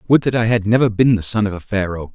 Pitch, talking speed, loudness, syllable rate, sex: 105 Hz, 305 wpm, -17 LUFS, 6.5 syllables/s, male